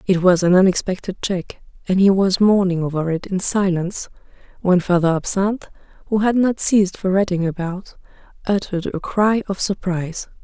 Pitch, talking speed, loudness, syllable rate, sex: 190 Hz, 155 wpm, -19 LUFS, 5.3 syllables/s, female